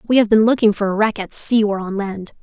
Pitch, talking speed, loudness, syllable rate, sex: 210 Hz, 295 wpm, -17 LUFS, 5.8 syllables/s, female